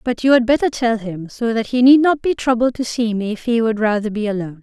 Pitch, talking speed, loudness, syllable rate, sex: 230 Hz, 285 wpm, -17 LUFS, 6.0 syllables/s, female